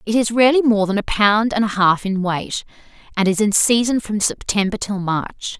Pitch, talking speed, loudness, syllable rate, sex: 210 Hz, 215 wpm, -18 LUFS, 5.0 syllables/s, female